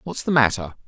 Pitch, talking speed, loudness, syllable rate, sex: 120 Hz, 205 wpm, -20 LUFS, 6.0 syllables/s, male